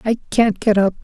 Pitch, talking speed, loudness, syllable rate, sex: 215 Hz, 230 wpm, -17 LUFS, 5.6 syllables/s, male